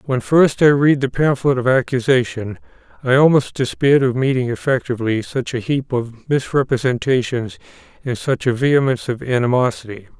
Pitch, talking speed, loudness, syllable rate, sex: 125 Hz, 145 wpm, -17 LUFS, 5.4 syllables/s, male